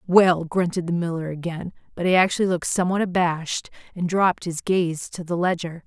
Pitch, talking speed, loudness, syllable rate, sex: 175 Hz, 185 wpm, -23 LUFS, 5.8 syllables/s, female